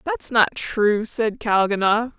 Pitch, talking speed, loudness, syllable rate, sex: 220 Hz, 135 wpm, -20 LUFS, 3.5 syllables/s, female